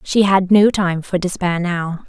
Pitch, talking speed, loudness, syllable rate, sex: 185 Hz, 200 wpm, -16 LUFS, 4.1 syllables/s, female